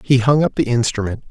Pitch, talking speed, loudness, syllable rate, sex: 125 Hz, 230 wpm, -17 LUFS, 6.0 syllables/s, male